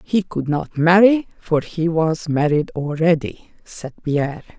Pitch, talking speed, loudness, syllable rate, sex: 165 Hz, 145 wpm, -19 LUFS, 4.0 syllables/s, female